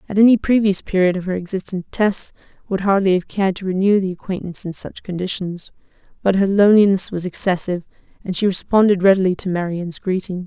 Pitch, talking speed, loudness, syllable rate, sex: 190 Hz, 180 wpm, -18 LUFS, 6.4 syllables/s, female